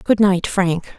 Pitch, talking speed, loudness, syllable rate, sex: 190 Hz, 185 wpm, -17 LUFS, 3.3 syllables/s, female